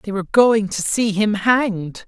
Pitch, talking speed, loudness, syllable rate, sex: 210 Hz, 205 wpm, -17 LUFS, 4.6 syllables/s, male